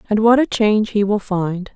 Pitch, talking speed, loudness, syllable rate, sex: 210 Hz, 240 wpm, -17 LUFS, 5.2 syllables/s, female